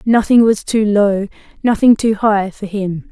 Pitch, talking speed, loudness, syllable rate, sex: 210 Hz, 175 wpm, -14 LUFS, 4.1 syllables/s, female